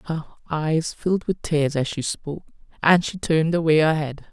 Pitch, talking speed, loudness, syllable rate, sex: 155 Hz, 195 wpm, -22 LUFS, 5.1 syllables/s, female